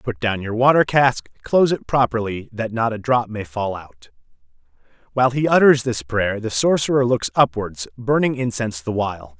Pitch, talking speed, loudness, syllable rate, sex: 115 Hz, 180 wpm, -19 LUFS, 5.1 syllables/s, male